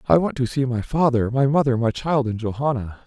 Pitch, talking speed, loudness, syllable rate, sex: 125 Hz, 235 wpm, -21 LUFS, 5.6 syllables/s, male